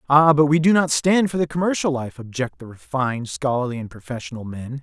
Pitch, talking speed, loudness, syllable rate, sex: 140 Hz, 210 wpm, -21 LUFS, 5.8 syllables/s, male